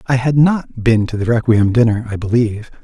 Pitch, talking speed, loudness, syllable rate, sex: 115 Hz, 210 wpm, -15 LUFS, 5.5 syllables/s, male